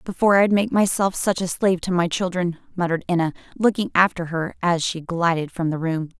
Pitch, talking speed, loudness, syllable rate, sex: 180 Hz, 205 wpm, -21 LUFS, 5.8 syllables/s, female